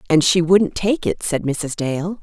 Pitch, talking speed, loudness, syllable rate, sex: 170 Hz, 215 wpm, -18 LUFS, 3.9 syllables/s, female